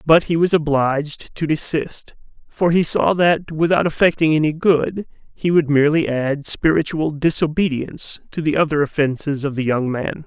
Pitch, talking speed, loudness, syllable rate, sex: 155 Hz, 165 wpm, -18 LUFS, 4.9 syllables/s, male